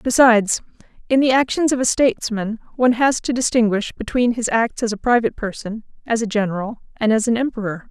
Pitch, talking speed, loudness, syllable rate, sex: 230 Hz, 190 wpm, -19 LUFS, 6.0 syllables/s, female